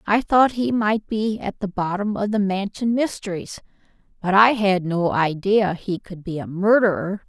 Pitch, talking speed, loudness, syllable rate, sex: 200 Hz, 180 wpm, -21 LUFS, 4.5 syllables/s, female